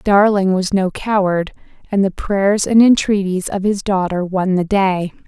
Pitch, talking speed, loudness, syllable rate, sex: 195 Hz, 170 wpm, -16 LUFS, 4.2 syllables/s, female